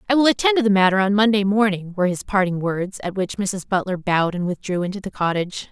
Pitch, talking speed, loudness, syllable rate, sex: 195 Hz, 240 wpm, -20 LUFS, 6.4 syllables/s, female